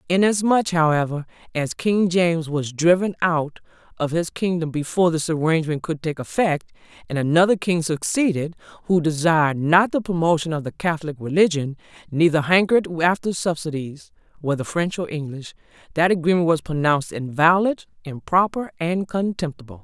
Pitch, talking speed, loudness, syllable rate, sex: 165 Hz, 140 wpm, -21 LUFS, 5.2 syllables/s, female